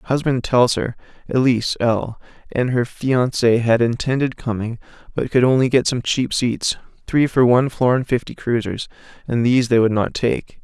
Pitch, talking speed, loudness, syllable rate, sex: 120 Hz, 175 wpm, -19 LUFS, 5.0 syllables/s, male